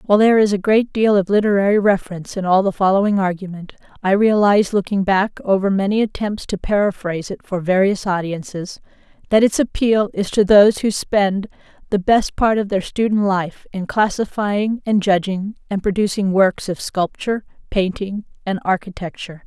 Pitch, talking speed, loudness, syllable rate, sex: 200 Hz, 165 wpm, -18 LUFS, 5.4 syllables/s, female